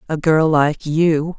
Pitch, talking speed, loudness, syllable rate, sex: 155 Hz, 175 wpm, -16 LUFS, 3.3 syllables/s, female